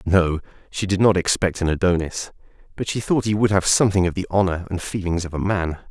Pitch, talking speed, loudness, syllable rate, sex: 95 Hz, 225 wpm, -21 LUFS, 5.9 syllables/s, male